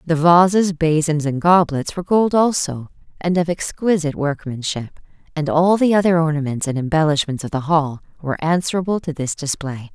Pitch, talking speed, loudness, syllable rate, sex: 160 Hz, 165 wpm, -18 LUFS, 5.3 syllables/s, female